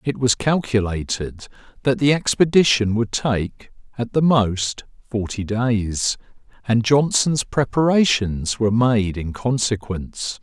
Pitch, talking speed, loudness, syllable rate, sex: 115 Hz, 115 wpm, -20 LUFS, 3.9 syllables/s, male